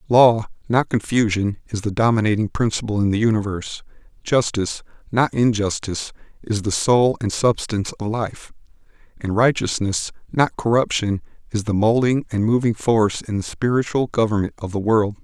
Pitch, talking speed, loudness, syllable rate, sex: 110 Hz, 145 wpm, -20 LUFS, 5.3 syllables/s, male